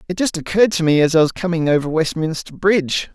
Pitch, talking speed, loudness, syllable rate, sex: 165 Hz, 230 wpm, -17 LUFS, 6.5 syllables/s, male